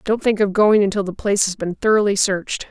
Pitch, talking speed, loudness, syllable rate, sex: 200 Hz, 245 wpm, -18 LUFS, 6.1 syllables/s, female